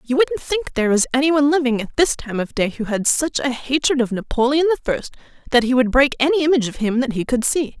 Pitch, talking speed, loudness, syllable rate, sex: 265 Hz, 255 wpm, -18 LUFS, 6.2 syllables/s, female